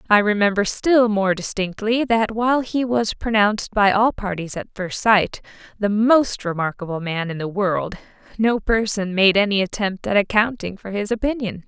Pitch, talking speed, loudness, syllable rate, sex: 210 Hz, 170 wpm, -20 LUFS, 4.8 syllables/s, female